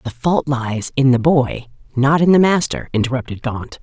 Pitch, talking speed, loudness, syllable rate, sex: 135 Hz, 190 wpm, -17 LUFS, 4.8 syllables/s, female